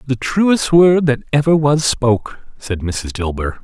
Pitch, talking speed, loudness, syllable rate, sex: 130 Hz, 180 wpm, -15 LUFS, 4.4 syllables/s, male